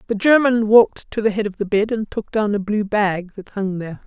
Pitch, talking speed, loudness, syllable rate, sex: 210 Hz, 265 wpm, -18 LUFS, 5.5 syllables/s, female